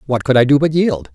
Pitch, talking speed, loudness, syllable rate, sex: 135 Hz, 315 wpm, -14 LUFS, 5.9 syllables/s, male